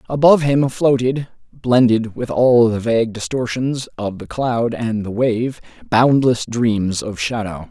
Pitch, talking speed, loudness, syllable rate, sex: 120 Hz, 150 wpm, -17 LUFS, 4.0 syllables/s, male